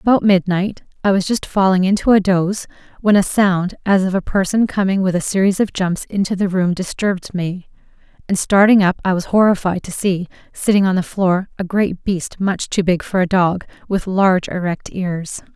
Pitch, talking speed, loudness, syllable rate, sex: 190 Hz, 200 wpm, -17 LUFS, 5.1 syllables/s, female